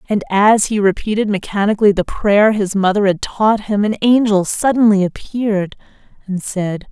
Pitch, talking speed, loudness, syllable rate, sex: 205 Hz, 155 wpm, -15 LUFS, 4.9 syllables/s, female